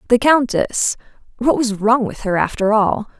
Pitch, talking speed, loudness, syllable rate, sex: 230 Hz, 150 wpm, -17 LUFS, 4.5 syllables/s, female